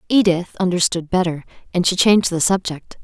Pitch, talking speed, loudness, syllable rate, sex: 180 Hz, 160 wpm, -18 LUFS, 5.6 syllables/s, female